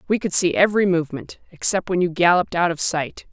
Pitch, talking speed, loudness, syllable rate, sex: 175 Hz, 215 wpm, -19 LUFS, 6.2 syllables/s, female